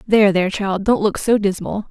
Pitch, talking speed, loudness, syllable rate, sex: 205 Hz, 220 wpm, -17 LUFS, 5.8 syllables/s, female